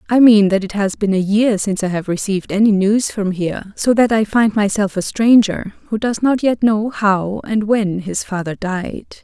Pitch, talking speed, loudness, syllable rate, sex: 205 Hz, 220 wpm, -16 LUFS, 4.8 syllables/s, female